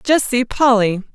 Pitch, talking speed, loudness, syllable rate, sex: 240 Hz, 155 wpm, -16 LUFS, 4.2 syllables/s, female